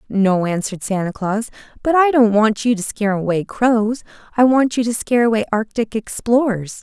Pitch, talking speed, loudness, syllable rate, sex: 220 Hz, 185 wpm, -17 LUFS, 5.2 syllables/s, female